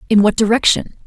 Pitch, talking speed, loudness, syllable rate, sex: 215 Hz, 170 wpm, -14 LUFS, 6.5 syllables/s, female